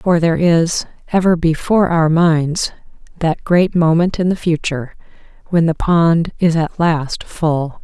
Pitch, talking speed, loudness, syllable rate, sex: 165 Hz, 155 wpm, -15 LUFS, 4.2 syllables/s, female